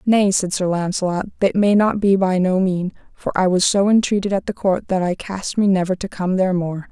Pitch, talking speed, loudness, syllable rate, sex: 190 Hz, 245 wpm, -19 LUFS, 5.3 syllables/s, female